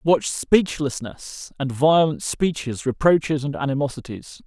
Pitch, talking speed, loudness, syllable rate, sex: 145 Hz, 95 wpm, -21 LUFS, 4.2 syllables/s, male